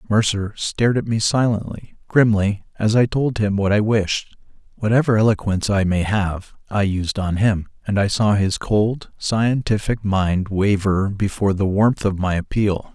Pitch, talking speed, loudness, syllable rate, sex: 105 Hz, 165 wpm, -19 LUFS, 4.5 syllables/s, male